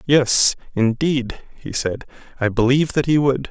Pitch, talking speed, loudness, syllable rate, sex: 130 Hz, 155 wpm, -19 LUFS, 4.6 syllables/s, male